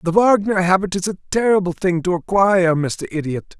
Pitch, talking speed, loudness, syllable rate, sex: 185 Hz, 185 wpm, -18 LUFS, 5.4 syllables/s, male